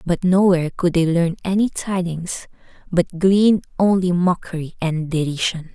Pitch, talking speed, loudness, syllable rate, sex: 175 Hz, 135 wpm, -19 LUFS, 4.7 syllables/s, female